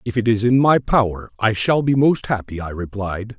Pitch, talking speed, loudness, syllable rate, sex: 110 Hz, 230 wpm, -19 LUFS, 5.0 syllables/s, male